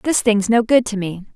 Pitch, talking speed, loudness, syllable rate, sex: 220 Hz, 265 wpm, -17 LUFS, 4.8 syllables/s, female